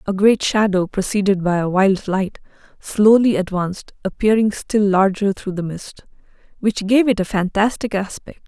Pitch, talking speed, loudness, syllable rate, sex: 200 Hz, 155 wpm, -18 LUFS, 4.7 syllables/s, female